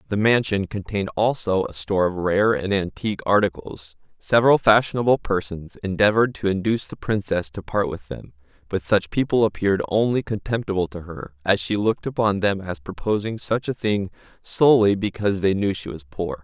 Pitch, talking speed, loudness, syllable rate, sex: 100 Hz, 175 wpm, -22 LUFS, 5.6 syllables/s, male